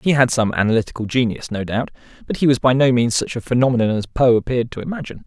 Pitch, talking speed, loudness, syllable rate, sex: 120 Hz, 240 wpm, -18 LUFS, 7.0 syllables/s, male